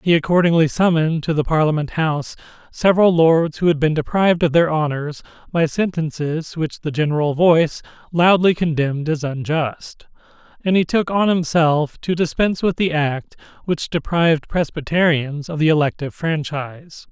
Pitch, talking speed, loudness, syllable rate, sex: 160 Hz, 150 wpm, -18 LUFS, 5.1 syllables/s, male